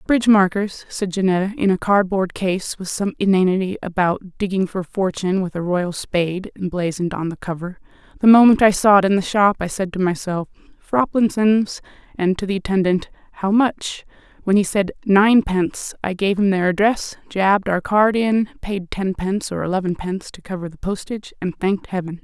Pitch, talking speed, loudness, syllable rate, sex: 195 Hz, 180 wpm, -19 LUFS, 5.4 syllables/s, female